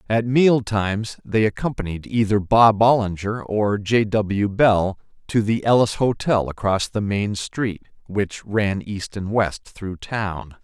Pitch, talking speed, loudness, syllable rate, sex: 105 Hz, 150 wpm, -21 LUFS, 3.8 syllables/s, male